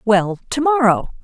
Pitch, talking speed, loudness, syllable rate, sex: 235 Hz, 145 wpm, -17 LUFS, 4.2 syllables/s, female